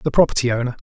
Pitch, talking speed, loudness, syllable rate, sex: 130 Hz, 205 wpm, -19 LUFS, 8.0 syllables/s, male